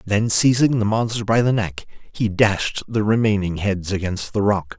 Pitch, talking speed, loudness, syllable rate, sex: 105 Hz, 190 wpm, -20 LUFS, 4.5 syllables/s, male